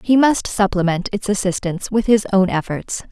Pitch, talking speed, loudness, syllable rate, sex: 200 Hz, 175 wpm, -18 LUFS, 5.2 syllables/s, female